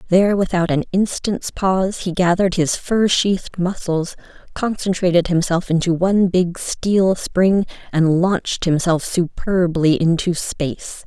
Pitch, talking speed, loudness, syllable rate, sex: 180 Hz, 130 wpm, -18 LUFS, 4.3 syllables/s, female